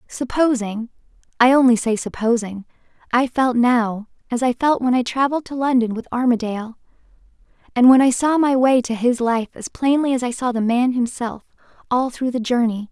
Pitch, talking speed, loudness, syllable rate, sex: 245 Hz, 170 wpm, -19 LUFS, 5.3 syllables/s, female